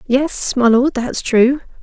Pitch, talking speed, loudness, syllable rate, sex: 255 Hz, 130 wpm, -15 LUFS, 3.5 syllables/s, female